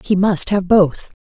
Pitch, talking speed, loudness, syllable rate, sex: 190 Hz, 195 wpm, -15 LUFS, 3.9 syllables/s, female